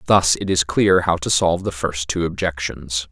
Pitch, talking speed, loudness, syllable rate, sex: 85 Hz, 210 wpm, -19 LUFS, 4.8 syllables/s, male